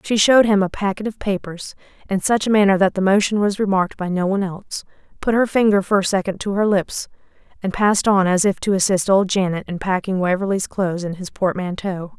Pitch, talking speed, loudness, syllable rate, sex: 195 Hz, 220 wpm, -19 LUFS, 6.0 syllables/s, female